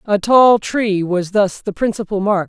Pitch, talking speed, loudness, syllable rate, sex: 205 Hz, 195 wpm, -16 LUFS, 4.2 syllables/s, female